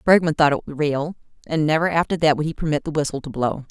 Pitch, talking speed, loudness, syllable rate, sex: 150 Hz, 245 wpm, -21 LUFS, 6.1 syllables/s, female